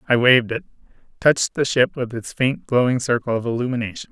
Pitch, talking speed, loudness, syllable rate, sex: 125 Hz, 190 wpm, -20 LUFS, 6.2 syllables/s, male